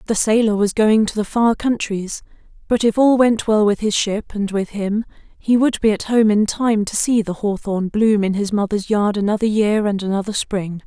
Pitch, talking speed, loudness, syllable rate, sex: 210 Hz, 220 wpm, -18 LUFS, 4.9 syllables/s, female